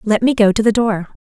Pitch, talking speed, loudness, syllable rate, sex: 215 Hz, 295 wpm, -15 LUFS, 5.6 syllables/s, female